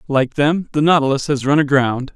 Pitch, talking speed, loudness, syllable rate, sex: 140 Hz, 195 wpm, -16 LUFS, 5.2 syllables/s, male